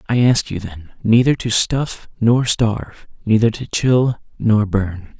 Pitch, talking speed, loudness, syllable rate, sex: 110 Hz, 160 wpm, -17 LUFS, 3.9 syllables/s, male